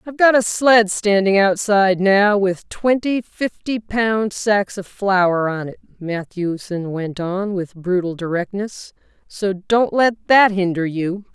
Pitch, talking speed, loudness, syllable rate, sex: 200 Hz, 145 wpm, -18 LUFS, 3.8 syllables/s, female